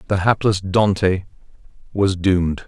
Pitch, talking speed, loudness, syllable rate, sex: 95 Hz, 110 wpm, -18 LUFS, 4.6 syllables/s, male